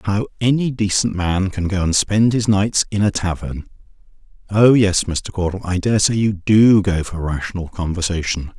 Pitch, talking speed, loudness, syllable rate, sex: 95 Hz, 170 wpm, -18 LUFS, 4.9 syllables/s, male